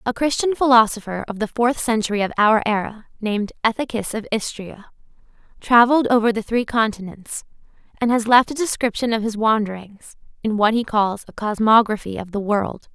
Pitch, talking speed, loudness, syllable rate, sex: 220 Hz, 165 wpm, -19 LUFS, 5.4 syllables/s, female